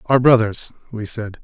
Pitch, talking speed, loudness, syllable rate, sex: 115 Hz, 165 wpm, -17 LUFS, 4.5 syllables/s, male